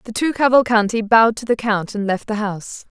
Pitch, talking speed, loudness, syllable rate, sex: 220 Hz, 220 wpm, -17 LUFS, 5.8 syllables/s, female